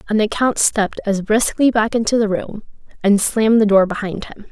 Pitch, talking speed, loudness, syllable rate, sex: 215 Hz, 210 wpm, -17 LUFS, 5.5 syllables/s, female